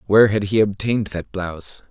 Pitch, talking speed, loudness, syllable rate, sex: 100 Hz, 190 wpm, -20 LUFS, 5.9 syllables/s, male